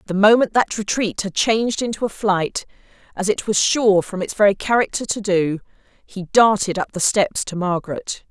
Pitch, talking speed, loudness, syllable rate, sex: 205 Hz, 190 wpm, -19 LUFS, 3.6 syllables/s, female